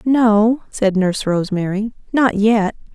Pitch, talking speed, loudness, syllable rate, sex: 215 Hz, 120 wpm, -17 LUFS, 4.1 syllables/s, female